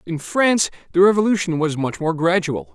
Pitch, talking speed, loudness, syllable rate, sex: 180 Hz, 175 wpm, -19 LUFS, 5.5 syllables/s, male